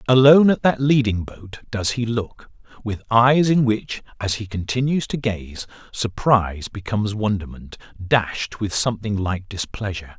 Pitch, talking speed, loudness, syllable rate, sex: 110 Hz, 145 wpm, -20 LUFS, 4.6 syllables/s, male